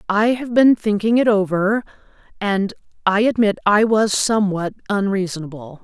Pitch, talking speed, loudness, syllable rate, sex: 205 Hz, 135 wpm, -18 LUFS, 4.8 syllables/s, female